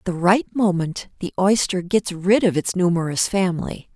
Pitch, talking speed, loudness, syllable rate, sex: 185 Hz, 180 wpm, -20 LUFS, 4.9 syllables/s, female